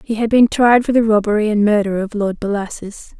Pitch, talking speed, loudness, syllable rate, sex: 215 Hz, 225 wpm, -15 LUFS, 5.5 syllables/s, female